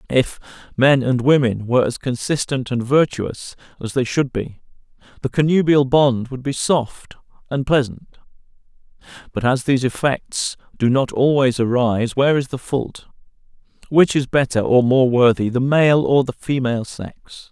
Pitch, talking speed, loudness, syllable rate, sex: 130 Hz, 155 wpm, -18 LUFS, 4.7 syllables/s, male